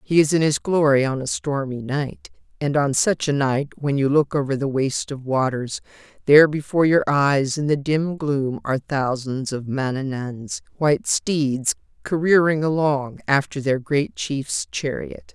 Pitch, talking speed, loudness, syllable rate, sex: 140 Hz, 170 wpm, -21 LUFS, 4.4 syllables/s, female